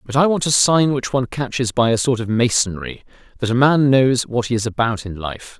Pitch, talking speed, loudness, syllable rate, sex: 120 Hz, 245 wpm, -18 LUFS, 5.5 syllables/s, male